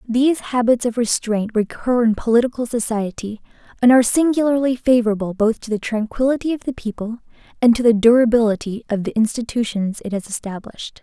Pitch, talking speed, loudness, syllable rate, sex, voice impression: 230 Hz, 160 wpm, -18 LUFS, 6.0 syllables/s, female, feminine, young, relaxed, weak, raspy, slightly cute, intellectual, calm, elegant, slightly sweet, kind, modest